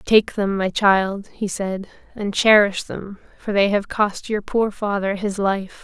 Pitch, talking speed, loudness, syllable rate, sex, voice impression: 200 Hz, 185 wpm, -20 LUFS, 3.8 syllables/s, female, feminine, slightly young, slightly fluent, slightly cute, slightly calm, friendly, slightly sweet, slightly kind